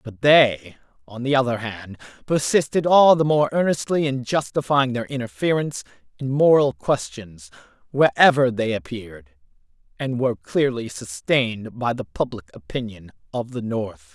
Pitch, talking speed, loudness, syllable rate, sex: 130 Hz, 135 wpm, -21 LUFS, 4.7 syllables/s, male